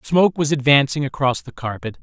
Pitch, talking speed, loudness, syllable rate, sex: 135 Hz, 180 wpm, -19 LUFS, 5.8 syllables/s, male